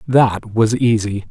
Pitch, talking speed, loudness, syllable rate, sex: 110 Hz, 140 wpm, -16 LUFS, 3.5 syllables/s, male